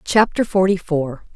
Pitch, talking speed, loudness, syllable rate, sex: 180 Hz, 130 wpm, -18 LUFS, 4.2 syllables/s, female